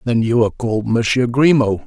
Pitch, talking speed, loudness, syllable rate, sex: 120 Hz, 195 wpm, -16 LUFS, 5.7 syllables/s, male